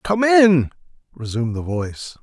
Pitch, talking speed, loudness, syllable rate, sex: 135 Hz, 135 wpm, -18 LUFS, 4.6 syllables/s, male